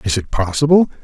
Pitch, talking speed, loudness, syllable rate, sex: 120 Hz, 175 wpm, -16 LUFS, 6.0 syllables/s, male